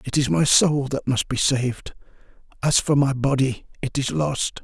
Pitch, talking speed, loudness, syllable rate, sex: 135 Hz, 195 wpm, -21 LUFS, 4.6 syllables/s, male